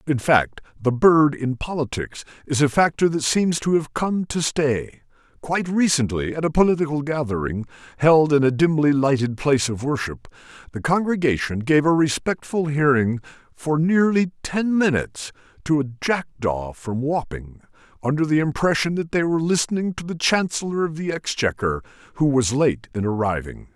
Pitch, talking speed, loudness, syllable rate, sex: 145 Hz, 160 wpm, -21 LUFS, 5.0 syllables/s, male